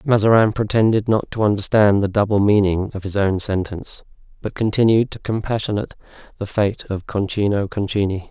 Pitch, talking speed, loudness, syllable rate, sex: 105 Hz, 150 wpm, -19 LUFS, 5.7 syllables/s, male